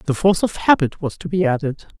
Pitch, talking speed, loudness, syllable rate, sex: 180 Hz, 240 wpm, -19 LUFS, 5.9 syllables/s, female